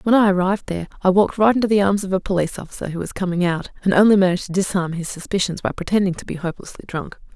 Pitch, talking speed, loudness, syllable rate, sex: 190 Hz, 255 wpm, -20 LUFS, 7.6 syllables/s, female